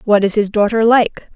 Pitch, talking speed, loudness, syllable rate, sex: 215 Hz, 220 wpm, -14 LUFS, 5.0 syllables/s, female